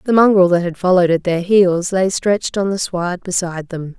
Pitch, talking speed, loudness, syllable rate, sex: 185 Hz, 225 wpm, -16 LUFS, 5.5 syllables/s, female